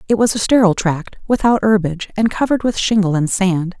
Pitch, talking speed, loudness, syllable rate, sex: 200 Hz, 205 wpm, -16 LUFS, 6.1 syllables/s, female